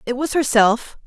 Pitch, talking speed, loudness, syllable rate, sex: 250 Hz, 170 wpm, -18 LUFS, 4.6 syllables/s, female